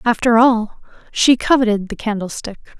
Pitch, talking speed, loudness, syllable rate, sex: 225 Hz, 130 wpm, -16 LUFS, 4.9 syllables/s, female